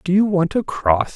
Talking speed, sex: 260 wpm, male